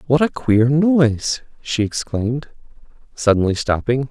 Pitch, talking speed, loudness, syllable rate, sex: 130 Hz, 115 wpm, -18 LUFS, 4.4 syllables/s, male